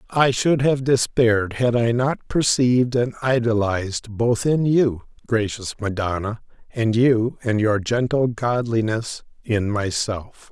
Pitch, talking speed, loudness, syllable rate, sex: 115 Hz, 130 wpm, -21 LUFS, 3.9 syllables/s, male